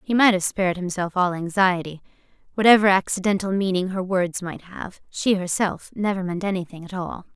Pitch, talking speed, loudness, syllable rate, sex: 185 Hz, 170 wpm, -22 LUFS, 5.4 syllables/s, female